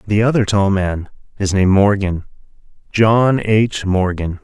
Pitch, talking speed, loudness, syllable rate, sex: 100 Hz, 135 wpm, -16 LUFS, 4.2 syllables/s, male